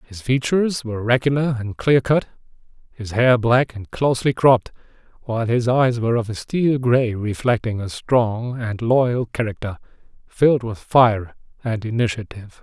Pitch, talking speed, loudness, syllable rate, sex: 120 Hz, 150 wpm, -20 LUFS, 4.9 syllables/s, male